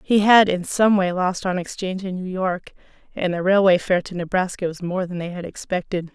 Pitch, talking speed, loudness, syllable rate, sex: 185 Hz, 225 wpm, -21 LUFS, 5.3 syllables/s, female